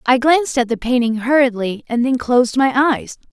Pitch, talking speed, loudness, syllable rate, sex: 250 Hz, 200 wpm, -16 LUFS, 5.3 syllables/s, female